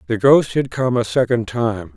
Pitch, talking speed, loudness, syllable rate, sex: 120 Hz, 215 wpm, -17 LUFS, 4.5 syllables/s, male